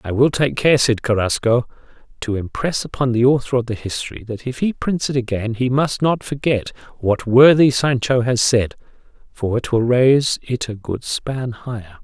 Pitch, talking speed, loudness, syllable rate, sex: 120 Hz, 190 wpm, -18 LUFS, 4.9 syllables/s, male